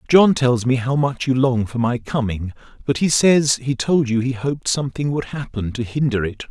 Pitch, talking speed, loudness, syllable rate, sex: 130 Hz, 220 wpm, -19 LUFS, 5.1 syllables/s, male